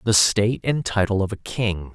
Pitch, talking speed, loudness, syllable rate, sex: 105 Hz, 215 wpm, -21 LUFS, 4.9 syllables/s, male